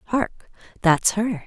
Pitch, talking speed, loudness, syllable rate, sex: 205 Hz, 125 wpm, -22 LUFS, 3.1 syllables/s, female